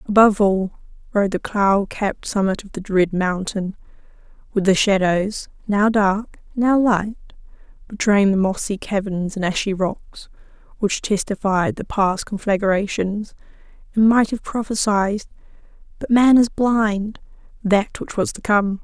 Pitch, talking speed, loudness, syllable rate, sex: 205 Hz, 130 wpm, -19 LUFS, 4.2 syllables/s, female